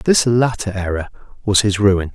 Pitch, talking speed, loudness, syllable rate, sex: 105 Hz, 170 wpm, -17 LUFS, 4.5 syllables/s, male